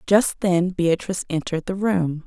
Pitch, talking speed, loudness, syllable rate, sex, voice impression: 180 Hz, 160 wpm, -22 LUFS, 4.9 syllables/s, female, feminine, middle-aged, slightly relaxed, slightly hard, raspy, calm, friendly, reassuring, modest